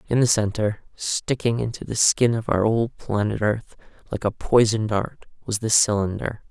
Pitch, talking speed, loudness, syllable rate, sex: 110 Hz, 175 wpm, -22 LUFS, 4.7 syllables/s, male